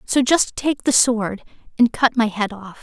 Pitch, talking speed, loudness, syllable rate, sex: 235 Hz, 215 wpm, -18 LUFS, 4.2 syllables/s, female